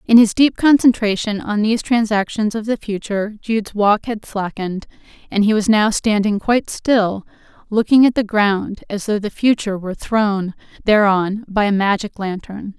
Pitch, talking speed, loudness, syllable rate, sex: 210 Hz, 170 wpm, -17 LUFS, 4.9 syllables/s, female